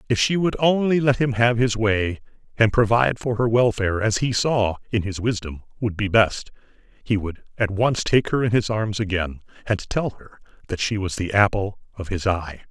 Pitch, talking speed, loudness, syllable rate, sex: 110 Hz, 210 wpm, -21 LUFS, 5.0 syllables/s, male